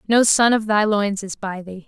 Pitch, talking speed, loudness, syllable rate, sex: 205 Hz, 255 wpm, -18 LUFS, 4.7 syllables/s, female